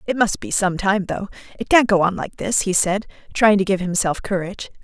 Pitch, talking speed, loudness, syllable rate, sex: 195 Hz, 235 wpm, -19 LUFS, 5.5 syllables/s, female